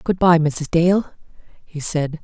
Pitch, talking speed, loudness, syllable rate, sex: 165 Hz, 160 wpm, -18 LUFS, 3.6 syllables/s, female